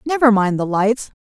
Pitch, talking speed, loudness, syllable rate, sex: 225 Hz, 195 wpm, -17 LUFS, 4.9 syllables/s, female